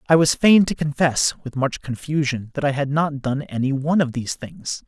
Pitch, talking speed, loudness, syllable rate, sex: 140 Hz, 220 wpm, -21 LUFS, 5.2 syllables/s, male